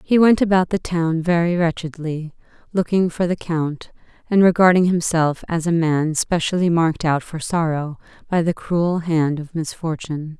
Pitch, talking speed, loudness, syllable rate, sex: 165 Hz, 160 wpm, -19 LUFS, 4.7 syllables/s, female